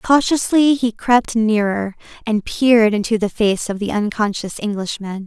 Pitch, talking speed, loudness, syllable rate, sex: 220 Hz, 150 wpm, -17 LUFS, 4.5 syllables/s, female